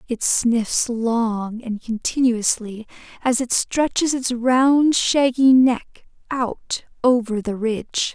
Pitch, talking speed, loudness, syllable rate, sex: 245 Hz, 120 wpm, -20 LUFS, 3.2 syllables/s, female